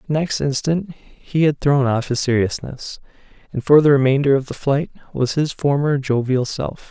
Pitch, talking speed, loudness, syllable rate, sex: 140 Hz, 175 wpm, -18 LUFS, 4.5 syllables/s, male